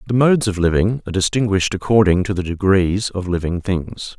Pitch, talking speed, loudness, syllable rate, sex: 100 Hz, 185 wpm, -18 LUFS, 5.8 syllables/s, male